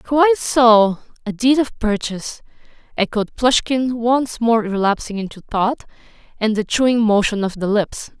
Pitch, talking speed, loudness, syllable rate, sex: 225 Hz, 140 wpm, -17 LUFS, 4.5 syllables/s, female